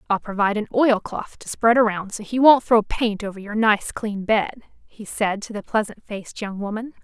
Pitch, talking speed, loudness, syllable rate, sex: 215 Hz, 215 wpm, -21 LUFS, 5.1 syllables/s, female